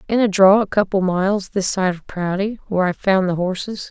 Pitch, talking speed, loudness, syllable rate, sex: 195 Hz, 245 wpm, -18 LUFS, 5.8 syllables/s, female